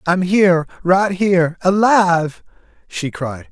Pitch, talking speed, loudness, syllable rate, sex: 175 Hz, 100 wpm, -16 LUFS, 4.1 syllables/s, male